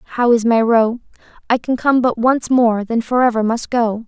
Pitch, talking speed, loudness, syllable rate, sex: 235 Hz, 220 wpm, -16 LUFS, 4.5 syllables/s, female